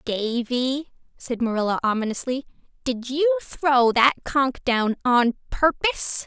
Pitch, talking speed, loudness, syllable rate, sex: 260 Hz, 115 wpm, -22 LUFS, 4.0 syllables/s, female